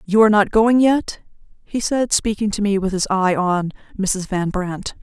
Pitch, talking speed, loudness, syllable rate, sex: 205 Hz, 205 wpm, -18 LUFS, 4.6 syllables/s, female